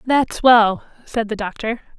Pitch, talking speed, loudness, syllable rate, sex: 225 Hz, 150 wpm, -18 LUFS, 4.0 syllables/s, female